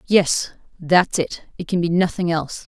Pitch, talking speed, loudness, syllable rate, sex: 170 Hz, 130 wpm, -20 LUFS, 4.9 syllables/s, female